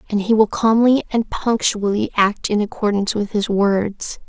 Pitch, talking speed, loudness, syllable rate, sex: 210 Hz, 170 wpm, -18 LUFS, 4.6 syllables/s, female